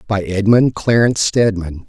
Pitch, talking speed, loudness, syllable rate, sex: 105 Hz, 130 wpm, -15 LUFS, 4.7 syllables/s, male